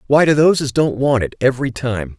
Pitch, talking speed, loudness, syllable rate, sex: 130 Hz, 245 wpm, -16 LUFS, 6.1 syllables/s, male